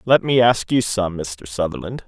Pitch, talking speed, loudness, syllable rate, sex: 105 Hz, 205 wpm, -19 LUFS, 4.6 syllables/s, male